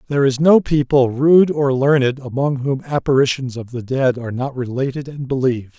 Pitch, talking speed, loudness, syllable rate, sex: 135 Hz, 185 wpm, -17 LUFS, 5.4 syllables/s, male